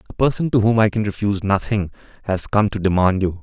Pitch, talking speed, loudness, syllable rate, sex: 105 Hz, 225 wpm, -19 LUFS, 6.3 syllables/s, male